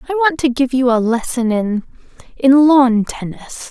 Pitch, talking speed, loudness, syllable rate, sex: 255 Hz, 160 wpm, -14 LUFS, 4.6 syllables/s, female